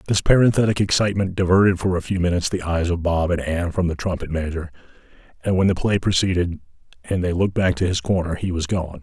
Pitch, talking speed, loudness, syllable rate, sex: 90 Hz, 220 wpm, -21 LUFS, 6.5 syllables/s, male